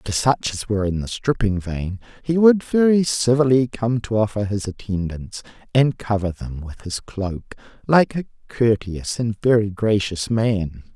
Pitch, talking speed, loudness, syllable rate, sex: 110 Hz, 165 wpm, -20 LUFS, 4.4 syllables/s, male